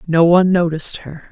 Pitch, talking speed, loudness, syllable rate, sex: 165 Hz, 180 wpm, -15 LUFS, 6.0 syllables/s, female